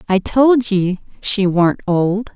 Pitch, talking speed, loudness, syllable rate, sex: 205 Hz, 125 wpm, -16 LUFS, 3.1 syllables/s, female